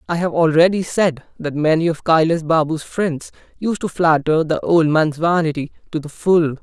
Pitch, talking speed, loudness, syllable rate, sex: 160 Hz, 180 wpm, -18 LUFS, 4.8 syllables/s, male